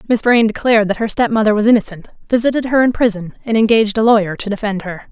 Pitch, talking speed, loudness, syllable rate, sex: 220 Hz, 225 wpm, -15 LUFS, 6.8 syllables/s, female